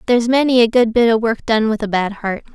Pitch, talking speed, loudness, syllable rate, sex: 225 Hz, 280 wpm, -16 LUFS, 6.1 syllables/s, female